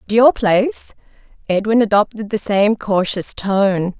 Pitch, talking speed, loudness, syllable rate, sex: 210 Hz, 135 wpm, -16 LUFS, 4.3 syllables/s, female